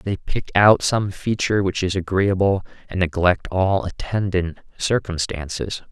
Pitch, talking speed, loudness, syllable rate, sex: 95 Hz, 130 wpm, -21 LUFS, 4.2 syllables/s, male